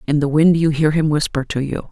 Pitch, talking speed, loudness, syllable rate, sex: 150 Hz, 280 wpm, -17 LUFS, 5.7 syllables/s, female